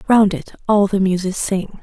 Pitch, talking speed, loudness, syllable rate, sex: 195 Hz, 195 wpm, -17 LUFS, 4.6 syllables/s, female